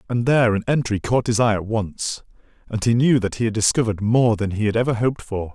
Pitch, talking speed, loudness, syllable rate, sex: 115 Hz, 240 wpm, -20 LUFS, 6.1 syllables/s, male